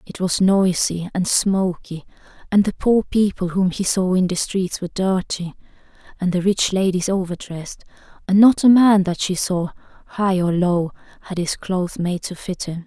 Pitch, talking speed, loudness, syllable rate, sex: 185 Hz, 185 wpm, -19 LUFS, 4.8 syllables/s, female